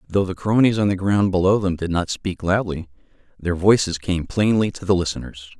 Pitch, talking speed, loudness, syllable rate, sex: 95 Hz, 205 wpm, -20 LUFS, 5.5 syllables/s, male